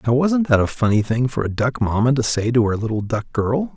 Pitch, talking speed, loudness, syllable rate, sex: 120 Hz, 270 wpm, -19 LUFS, 5.5 syllables/s, male